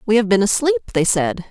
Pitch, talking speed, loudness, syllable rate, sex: 205 Hz, 240 wpm, -17 LUFS, 6.0 syllables/s, female